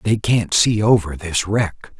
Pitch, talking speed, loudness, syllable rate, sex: 100 Hz, 180 wpm, -18 LUFS, 3.8 syllables/s, male